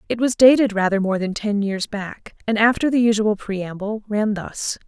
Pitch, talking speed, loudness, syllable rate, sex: 210 Hz, 195 wpm, -20 LUFS, 4.7 syllables/s, female